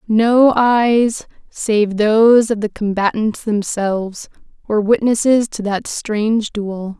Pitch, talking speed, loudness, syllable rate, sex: 215 Hz, 105 wpm, -16 LUFS, 3.7 syllables/s, female